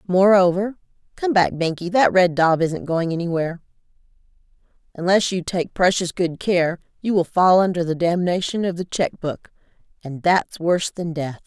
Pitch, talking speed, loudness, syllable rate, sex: 175 Hz, 150 wpm, -20 LUFS, 5.0 syllables/s, female